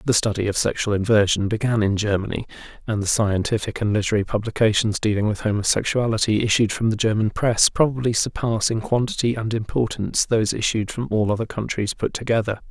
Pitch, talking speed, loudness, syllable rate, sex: 110 Hz, 170 wpm, -21 LUFS, 6.0 syllables/s, male